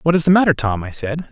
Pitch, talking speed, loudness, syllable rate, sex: 145 Hz, 320 wpm, -17 LUFS, 6.6 syllables/s, male